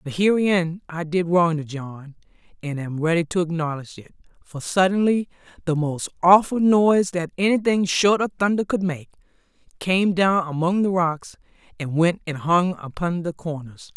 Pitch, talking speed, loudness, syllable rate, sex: 170 Hz, 165 wpm, -21 LUFS, 4.7 syllables/s, female